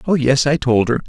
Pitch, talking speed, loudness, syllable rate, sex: 135 Hz, 280 wpm, -16 LUFS, 5.6 syllables/s, male